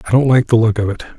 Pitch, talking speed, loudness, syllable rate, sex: 115 Hz, 355 wpm, -14 LUFS, 7.9 syllables/s, male